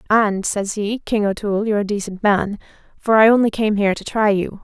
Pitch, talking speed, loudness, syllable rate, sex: 210 Hz, 220 wpm, -18 LUFS, 5.7 syllables/s, female